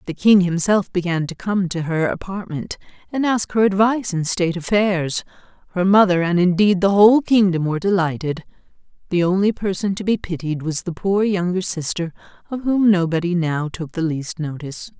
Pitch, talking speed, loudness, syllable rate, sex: 185 Hz, 175 wpm, -19 LUFS, 5.3 syllables/s, female